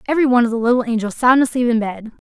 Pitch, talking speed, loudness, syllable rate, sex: 240 Hz, 265 wpm, -16 LUFS, 8.2 syllables/s, female